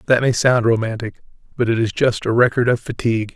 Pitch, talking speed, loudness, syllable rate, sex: 115 Hz, 195 wpm, -18 LUFS, 6.0 syllables/s, male